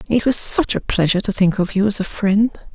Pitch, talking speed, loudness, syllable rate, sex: 205 Hz, 265 wpm, -17 LUFS, 6.0 syllables/s, female